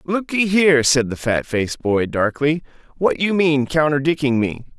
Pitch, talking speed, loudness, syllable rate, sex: 145 Hz, 165 wpm, -18 LUFS, 4.8 syllables/s, male